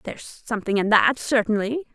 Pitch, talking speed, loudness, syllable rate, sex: 225 Hz, 155 wpm, -21 LUFS, 5.8 syllables/s, female